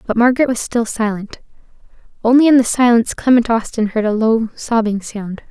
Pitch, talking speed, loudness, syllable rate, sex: 230 Hz, 175 wpm, -15 LUFS, 5.6 syllables/s, female